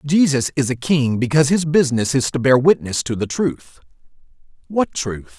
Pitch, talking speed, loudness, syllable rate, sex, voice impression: 140 Hz, 180 wpm, -18 LUFS, 5.1 syllables/s, male, masculine, adult-like, slightly powerful, clear, fluent, slightly raspy, slightly cool, slightly mature, friendly, wild, lively, slightly strict, slightly sharp